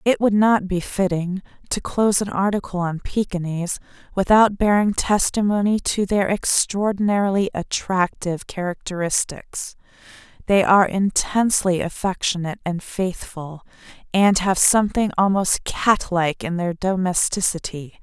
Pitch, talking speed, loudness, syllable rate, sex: 190 Hz, 115 wpm, -20 LUFS, 4.7 syllables/s, female